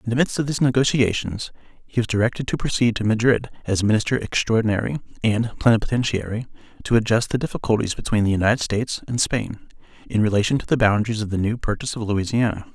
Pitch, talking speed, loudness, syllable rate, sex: 110 Hz, 185 wpm, -21 LUFS, 6.7 syllables/s, male